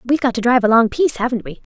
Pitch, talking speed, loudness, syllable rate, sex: 240 Hz, 310 wpm, -16 LUFS, 8.4 syllables/s, female